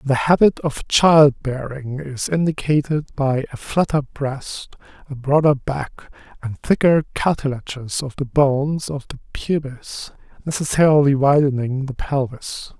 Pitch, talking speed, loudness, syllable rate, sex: 140 Hz, 125 wpm, -19 LUFS, 4.2 syllables/s, male